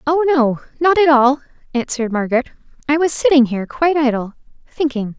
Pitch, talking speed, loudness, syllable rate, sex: 275 Hz, 160 wpm, -16 LUFS, 6.2 syllables/s, female